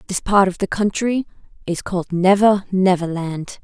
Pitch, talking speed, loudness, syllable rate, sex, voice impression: 190 Hz, 165 wpm, -18 LUFS, 4.7 syllables/s, female, very feminine, slightly young, adult-like, thin, slightly tensed, slightly powerful, slightly dark, hard, slightly clear, fluent, slightly cute, cool, very intellectual, refreshing, very sincere, calm, friendly, reassuring, elegant, slightly wild, slightly sweet, slightly lively, slightly strict, slightly sharp